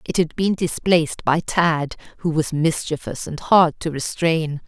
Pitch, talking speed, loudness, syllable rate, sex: 160 Hz, 165 wpm, -20 LUFS, 4.2 syllables/s, female